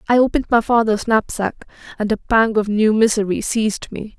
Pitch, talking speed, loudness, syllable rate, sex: 220 Hz, 185 wpm, -18 LUFS, 5.5 syllables/s, female